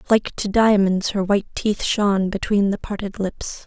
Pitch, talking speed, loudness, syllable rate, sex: 200 Hz, 180 wpm, -20 LUFS, 4.7 syllables/s, female